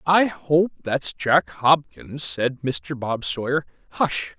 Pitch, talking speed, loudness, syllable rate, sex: 140 Hz, 135 wpm, -22 LUFS, 3.1 syllables/s, male